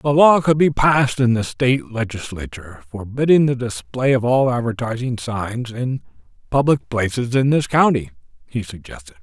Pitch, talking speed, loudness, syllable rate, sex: 120 Hz, 155 wpm, -18 LUFS, 5.0 syllables/s, male